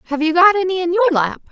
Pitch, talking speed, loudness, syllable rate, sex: 345 Hz, 280 wpm, -15 LUFS, 6.6 syllables/s, female